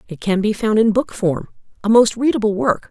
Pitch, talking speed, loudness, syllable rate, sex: 210 Hz, 230 wpm, -17 LUFS, 5.4 syllables/s, female